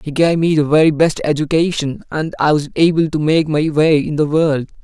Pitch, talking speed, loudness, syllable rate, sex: 155 Hz, 225 wpm, -15 LUFS, 5.2 syllables/s, male